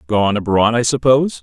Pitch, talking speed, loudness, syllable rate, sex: 115 Hz, 170 wpm, -15 LUFS, 5.5 syllables/s, male